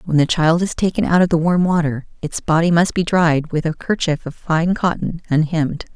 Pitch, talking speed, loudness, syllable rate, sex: 165 Hz, 220 wpm, -18 LUFS, 5.3 syllables/s, female